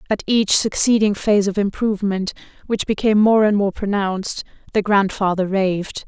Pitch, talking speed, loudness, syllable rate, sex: 205 Hz, 150 wpm, -18 LUFS, 5.4 syllables/s, female